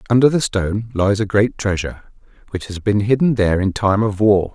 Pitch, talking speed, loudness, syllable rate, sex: 105 Hz, 210 wpm, -17 LUFS, 5.6 syllables/s, male